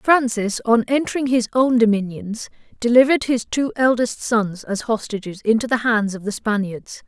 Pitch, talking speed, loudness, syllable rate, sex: 230 Hz, 160 wpm, -19 LUFS, 4.9 syllables/s, female